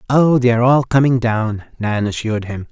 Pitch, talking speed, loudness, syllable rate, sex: 120 Hz, 200 wpm, -16 LUFS, 5.4 syllables/s, male